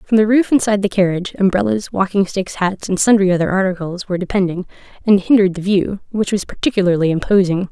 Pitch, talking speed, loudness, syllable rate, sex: 195 Hz, 185 wpm, -16 LUFS, 6.5 syllables/s, female